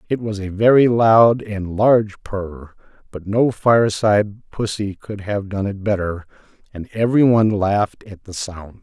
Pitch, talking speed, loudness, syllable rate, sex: 105 Hz, 165 wpm, -18 LUFS, 4.5 syllables/s, male